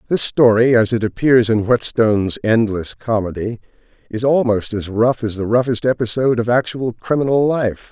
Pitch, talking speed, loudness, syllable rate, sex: 115 Hz, 160 wpm, -17 LUFS, 5.0 syllables/s, male